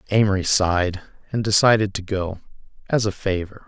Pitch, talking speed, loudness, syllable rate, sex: 100 Hz, 145 wpm, -21 LUFS, 5.6 syllables/s, male